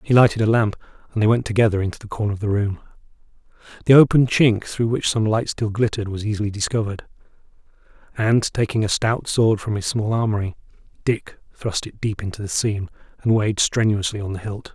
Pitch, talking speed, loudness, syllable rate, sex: 105 Hz, 195 wpm, -21 LUFS, 6.1 syllables/s, male